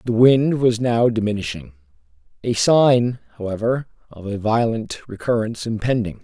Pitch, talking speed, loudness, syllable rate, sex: 110 Hz, 115 wpm, -19 LUFS, 4.8 syllables/s, male